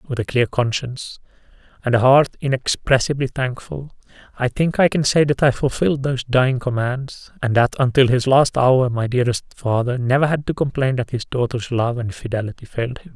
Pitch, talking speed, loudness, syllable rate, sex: 130 Hz, 185 wpm, -19 LUFS, 5.5 syllables/s, male